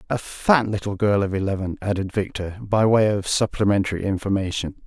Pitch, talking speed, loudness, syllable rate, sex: 100 Hz, 160 wpm, -22 LUFS, 5.5 syllables/s, male